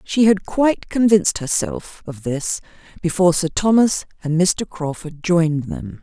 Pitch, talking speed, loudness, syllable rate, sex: 170 Hz, 150 wpm, -19 LUFS, 4.6 syllables/s, female